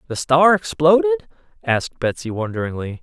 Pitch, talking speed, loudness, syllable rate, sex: 125 Hz, 120 wpm, -18 LUFS, 5.9 syllables/s, male